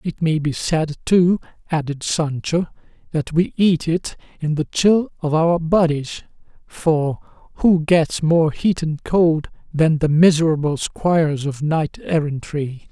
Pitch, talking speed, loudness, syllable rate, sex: 160 Hz, 145 wpm, -19 LUFS, 3.8 syllables/s, male